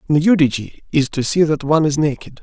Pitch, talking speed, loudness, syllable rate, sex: 150 Hz, 200 wpm, -17 LUFS, 5.5 syllables/s, male